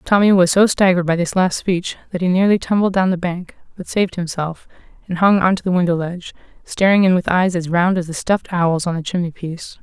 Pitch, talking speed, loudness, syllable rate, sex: 180 Hz, 230 wpm, -17 LUFS, 6.0 syllables/s, female